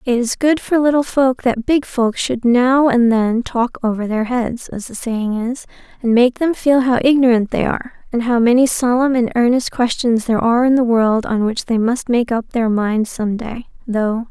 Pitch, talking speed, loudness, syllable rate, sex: 240 Hz, 225 wpm, -16 LUFS, 4.9 syllables/s, female